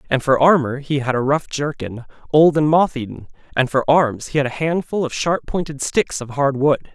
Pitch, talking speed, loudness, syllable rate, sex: 145 Hz, 225 wpm, -18 LUFS, 5.1 syllables/s, male